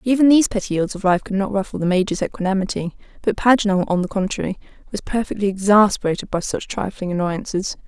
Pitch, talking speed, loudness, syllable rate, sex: 200 Hz, 185 wpm, -20 LUFS, 6.5 syllables/s, female